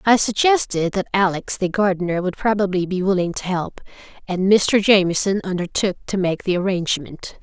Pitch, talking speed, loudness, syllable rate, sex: 190 Hz, 160 wpm, -19 LUFS, 5.3 syllables/s, female